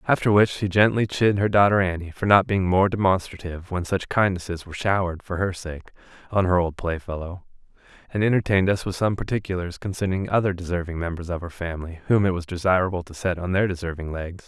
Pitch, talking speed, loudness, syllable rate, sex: 90 Hz, 200 wpm, -23 LUFS, 6.3 syllables/s, male